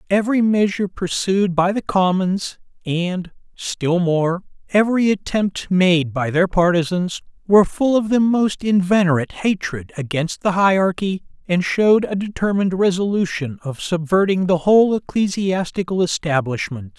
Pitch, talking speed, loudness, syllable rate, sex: 185 Hz, 125 wpm, -18 LUFS, 4.7 syllables/s, male